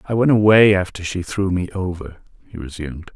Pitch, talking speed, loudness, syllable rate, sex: 95 Hz, 190 wpm, -17 LUFS, 5.6 syllables/s, male